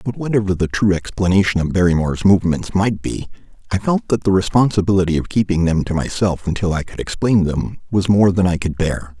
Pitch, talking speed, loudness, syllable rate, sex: 95 Hz, 200 wpm, -17 LUFS, 5.9 syllables/s, male